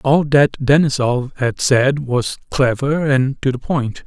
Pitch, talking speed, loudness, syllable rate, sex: 135 Hz, 160 wpm, -17 LUFS, 3.6 syllables/s, male